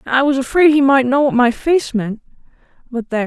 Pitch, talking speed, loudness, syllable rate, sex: 260 Hz, 240 wpm, -15 LUFS, 6.0 syllables/s, female